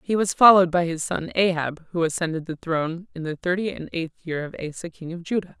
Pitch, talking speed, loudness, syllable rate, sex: 170 Hz, 235 wpm, -23 LUFS, 6.1 syllables/s, female